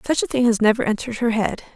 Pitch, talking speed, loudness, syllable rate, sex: 235 Hz, 275 wpm, -20 LUFS, 7.0 syllables/s, female